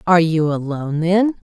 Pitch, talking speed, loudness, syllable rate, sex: 170 Hz, 160 wpm, -18 LUFS, 5.7 syllables/s, female